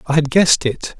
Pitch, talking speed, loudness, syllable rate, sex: 145 Hz, 240 wpm, -15 LUFS, 5.9 syllables/s, male